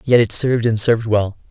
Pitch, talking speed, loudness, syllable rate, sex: 115 Hz, 240 wpm, -16 LUFS, 6.2 syllables/s, male